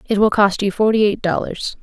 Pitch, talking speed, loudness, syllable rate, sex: 205 Hz, 230 wpm, -17 LUFS, 5.6 syllables/s, female